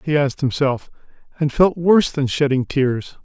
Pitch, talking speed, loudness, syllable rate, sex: 145 Hz, 165 wpm, -18 LUFS, 5.0 syllables/s, male